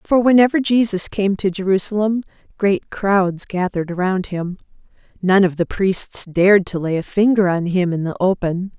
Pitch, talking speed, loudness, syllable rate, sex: 190 Hz, 170 wpm, -18 LUFS, 4.9 syllables/s, female